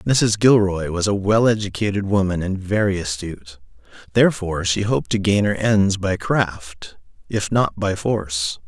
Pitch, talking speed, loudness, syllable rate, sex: 100 Hz, 160 wpm, -19 LUFS, 4.7 syllables/s, male